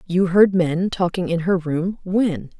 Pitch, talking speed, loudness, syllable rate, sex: 180 Hz, 160 wpm, -19 LUFS, 3.8 syllables/s, female